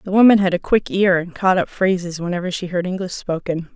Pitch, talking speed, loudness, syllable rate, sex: 185 Hz, 240 wpm, -18 LUFS, 5.8 syllables/s, female